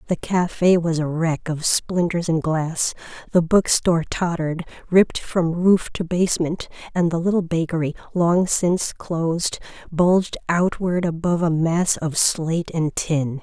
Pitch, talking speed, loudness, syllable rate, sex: 170 Hz, 150 wpm, -21 LUFS, 4.5 syllables/s, female